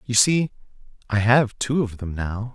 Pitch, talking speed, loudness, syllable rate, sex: 115 Hz, 190 wpm, -22 LUFS, 4.2 syllables/s, male